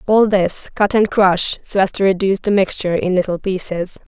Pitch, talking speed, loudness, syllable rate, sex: 195 Hz, 200 wpm, -17 LUFS, 5.3 syllables/s, female